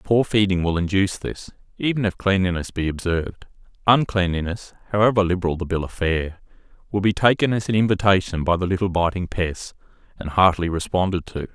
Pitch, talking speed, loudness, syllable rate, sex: 95 Hz, 165 wpm, -21 LUFS, 5.9 syllables/s, male